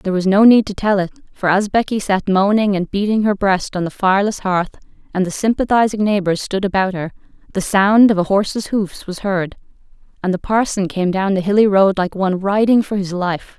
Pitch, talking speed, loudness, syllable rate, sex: 195 Hz, 215 wpm, -16 LUFS, 5.4 syllables/s, female